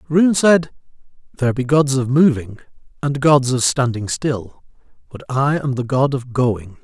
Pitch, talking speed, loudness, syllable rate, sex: 135 Hz, 165 wpm, -17 LUFS, 4.4 syllables/s, male